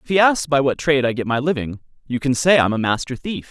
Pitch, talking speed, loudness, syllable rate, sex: 135 Hz, 290 wpm, -19 LUFS, 6.4 syllables/s, male